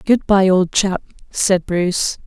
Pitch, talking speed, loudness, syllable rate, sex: 190 Hz, 160 wpm, -16 LUFS, 3.7 syllables/s, female